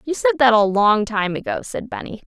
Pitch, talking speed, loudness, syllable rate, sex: 235 Hz, 235 wpm, -18 LUFS, 5.4 syllables/s, female